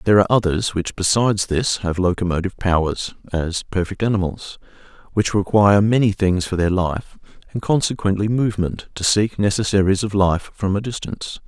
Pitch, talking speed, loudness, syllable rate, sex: 100 Hz, 155 wpm, -19 LUFS, 5.5 syllables/s, male